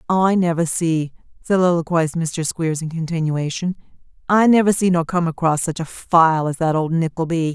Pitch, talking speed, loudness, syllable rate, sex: 165 Hz, 165 wpm, -19 LUFS, 5.0 syllables/s, female